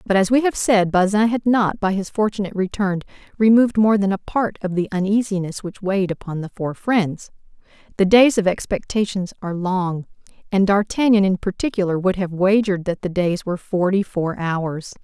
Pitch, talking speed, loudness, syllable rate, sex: 195 Hz, 185 wpm, -19 LUFS, 5.4 syllables/s, female